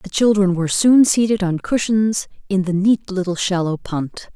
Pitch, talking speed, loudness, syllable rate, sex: 195 Hz, 180 wpm, -18 LUFS, 4.7 syllables/s, female